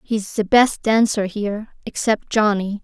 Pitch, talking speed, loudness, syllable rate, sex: 210 Hz, 150 wpm, -19 LUFS, 4.3 syllables/s, female